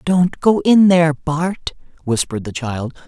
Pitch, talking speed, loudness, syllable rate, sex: 160 Hz, 155 wpm, -16 LUFS, 4.3 syllables/s, male